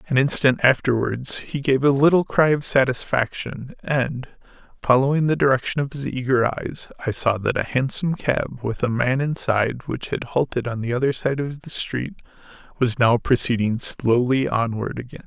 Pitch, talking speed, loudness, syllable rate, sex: 130 Hz, 175 wpm, -21 LUFS, 4.8 syllables/s, male